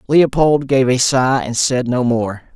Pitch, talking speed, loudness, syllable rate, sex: 130 Hz, 190 wpm, -15 LUFS, 3.9 syllables/s, male